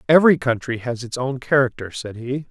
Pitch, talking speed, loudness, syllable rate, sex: 130 Hz, 190 wpm, -20 LUFS, 5.7 syllables/s, male